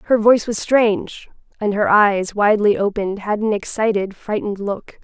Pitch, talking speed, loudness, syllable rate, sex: 210 Hz, 165 wpm, -18 LUFS, 5.3 syllables/s, female